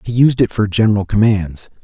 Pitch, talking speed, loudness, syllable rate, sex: 105 Hz, 195 wpm, -15 LUFS, 5.5 syllables/s, male